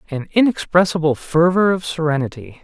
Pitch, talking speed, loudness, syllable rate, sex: 165 Hz, 115 wpm, -17 LUFS, 5.5 syllables/s, male